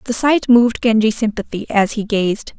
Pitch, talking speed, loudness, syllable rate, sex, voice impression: 220 Hz, 185 wpm, -16 LUFS, 5.1 syllables/s, female, very feminine, young, very thin, slightly relaxed, weak, slightly bright, slightly soft, slightly clear, raspy, cute, intellectual, slightly refreshing, sincere, calm, friendly, slightly reassuring, very unique, slightly elegant, wild, slightly sweet, slightly lively, slightly kind, sharp, slightly modest, light